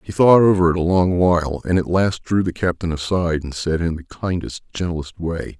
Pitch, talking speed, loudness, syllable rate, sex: 85 Hz, 225 wpm, -19 LUFS, 5.3 syllables/s, male